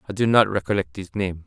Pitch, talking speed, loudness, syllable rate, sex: 100 Hz, 245 wpm, -22 LUFS, 6.1 syllables/s, male